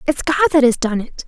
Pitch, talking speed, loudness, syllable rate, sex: 275 Hz, 280 wpm, -16 LUFS, 6.3 syllables/s, female